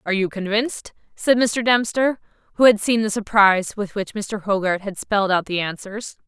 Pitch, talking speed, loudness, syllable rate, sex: 210 Hz, 190 wpm, -20 LUFS, 5.3 syllables/s, female